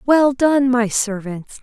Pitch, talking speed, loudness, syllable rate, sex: 245 Hz, 150 wpm, -17 LUFS, 3.3 syllables/s, female